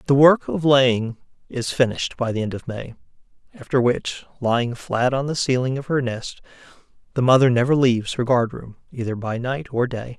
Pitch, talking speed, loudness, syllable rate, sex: 125 Hz, 195 wpm, -21 LUFS, 5.2 syllables/s, male